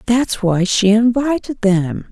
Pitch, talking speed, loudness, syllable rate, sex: 220 Hz, 140 wpm, -15 LUFS, 3.6 syllables/s, female